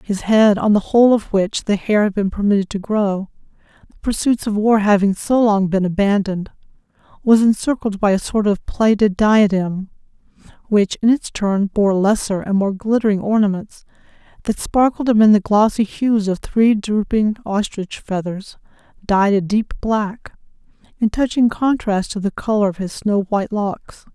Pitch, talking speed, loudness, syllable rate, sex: 210 Hz, 165 wpm, -17 LUFS, 4.7 syllables/s, female